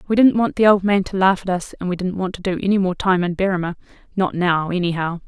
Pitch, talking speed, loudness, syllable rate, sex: 185 Hz, 260 wpm, -19 LUFS, 6.3 syllables/s, female